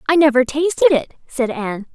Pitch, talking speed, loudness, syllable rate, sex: 275 Hz, 185 wpm, -17 LUFS, 5.8 syllables/s, female